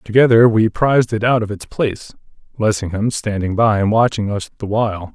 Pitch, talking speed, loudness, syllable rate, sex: 110 Hz, 175 wpm, -16 LUFS, 5.5 syllables/s, male